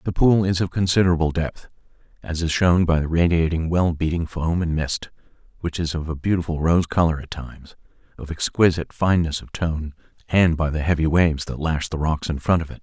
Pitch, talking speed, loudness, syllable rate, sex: 80 Hz, 205 wpm, -21 LUFS, 5.7 syllables/s, male